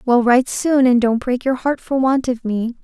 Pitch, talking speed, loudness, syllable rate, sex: 250 Hz, 255 wpm, -17 LUFS, 5.0 syllables/s, female